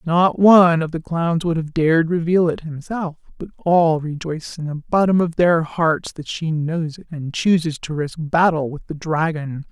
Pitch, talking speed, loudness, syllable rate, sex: 165 Hz, 200 wpm, -19 LUFS, 4.6 syllables/s, female